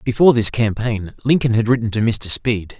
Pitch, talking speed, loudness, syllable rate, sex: 115 Hz, 195 wpm, -17 LUFS, 5.3 syllables/s, male